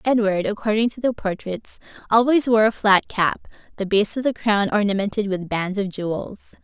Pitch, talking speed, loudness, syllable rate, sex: 210 Hz, 180 wpm, -21 LUFS, 4.9 syllables/s, female